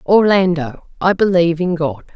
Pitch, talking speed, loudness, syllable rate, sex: 170 Hz, 140 wpm, -15 LUFS, 4.8 syllables/s, female